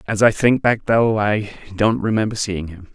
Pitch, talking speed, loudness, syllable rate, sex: 105 Hz, 205 wpm, -18 LUFS, 4.9 syllables/s, male